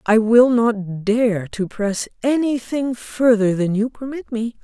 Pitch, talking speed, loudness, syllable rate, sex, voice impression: 230 Hz, 155 wpm, -19 LUFS, 3.7 syllables/s, female, very feminine, middle-aged, thin, slightly relaxed, powerful, slightly dark, soft, muffled, fluent, slightly raspy, cool, intellectual, slightly sincere, calm, slightly friendly, reassuring, unique, very elegant, slightly wild, sweet, slightly lively, strict, slightly sharp